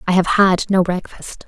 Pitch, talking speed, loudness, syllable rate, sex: 185 Hz, 205 wpm, -16 LUFS, 4.7 syllables/s, female